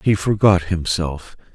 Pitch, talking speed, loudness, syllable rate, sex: 90 Hz, 115 wpm, -18 LUFS, 3.9 syllables/s, male